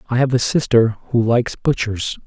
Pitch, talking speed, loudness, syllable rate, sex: 120 Hz, 185 wpm, -18 LUFS, 5.0 syllables/s, male